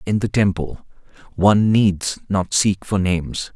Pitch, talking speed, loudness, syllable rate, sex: 95 Hz, 150 wpm, -19 LUFS, 4.2 syllables/s, male